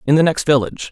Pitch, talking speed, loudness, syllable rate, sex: 145 Hz, 260 wpm, -16 LUFS, 7.8 syllables/s, male